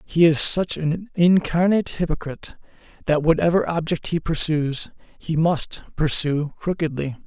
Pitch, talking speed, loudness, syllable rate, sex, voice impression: 160 Hz, 125 wpm, -21 LUFS, 4.5 syllables/s, male, masculine, middle-aged, slightly relaxed, powerful, slightly bright, soft, raspy, cool, friendly, reassuring, wild, lively, slightly kind